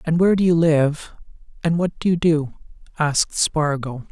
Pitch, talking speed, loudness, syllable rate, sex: 160 Hz, 175 wpm, -19 LUFS, 4.8 syllables/s, male